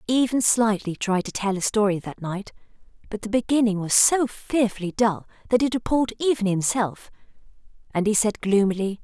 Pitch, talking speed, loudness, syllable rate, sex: 215 Hz, 165 wpm, -22 LUFS, 5.3 syllables/s, female